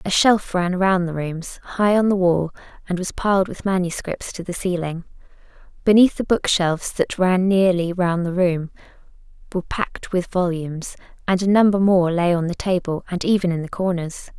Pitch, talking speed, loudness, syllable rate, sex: 180 Hz, 190 wpm, -20 LUFS, 5.2 syllables/s, female